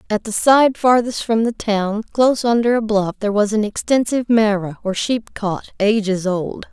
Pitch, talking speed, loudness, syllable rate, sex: 215 Hz, 180 wpm, -18 LUFS, 4.9 syllables/s, female